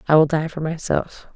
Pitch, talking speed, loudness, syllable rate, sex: 155 Hz, 220 wpm, -21 LUFS, 5.3 syllables/s, female